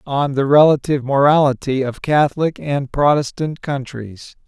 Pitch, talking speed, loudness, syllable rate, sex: 140 Hz, 120 wpm, -17 LUFS, 4.7 syllables/s, male